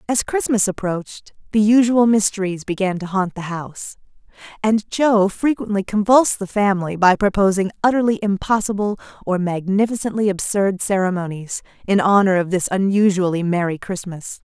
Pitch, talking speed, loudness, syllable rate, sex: 200 Hz, 130 wpm, -18 LUFS, 5.3 syllables/s, female